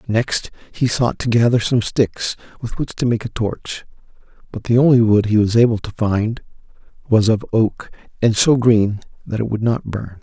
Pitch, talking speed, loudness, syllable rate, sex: 115 Hz, 195 wpm, -17 LUFS, 4.7 syllables/s, male